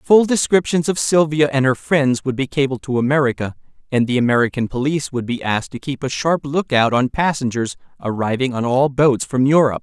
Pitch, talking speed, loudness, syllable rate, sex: 135 Hz, 200 wpm, -18 LUFS, 5.7 syllables/s, male